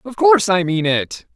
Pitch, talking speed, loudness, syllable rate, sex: 160 Hz, 220 wpm, -16 LUFS, 5.0 syllables/s, male